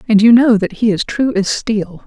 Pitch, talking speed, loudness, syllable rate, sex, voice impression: 215 Hz, 260 wpm, -13 LUFS, 4.9 syllables/s, female, feminine, slightly gender-neutral, adult-like, slightly middle-aged, very relaxed, very weak, slightly dark, soft, slightly muffled, very fluent, raspy, cute